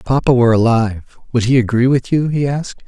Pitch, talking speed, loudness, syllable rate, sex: 125 Hz, 230 wpm, -15 LUFS, 6.6 syllables/s, male